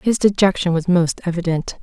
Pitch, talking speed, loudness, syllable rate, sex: 180 Hz, 165 wpm, -18 LUFS, 5.1 syllables/s, female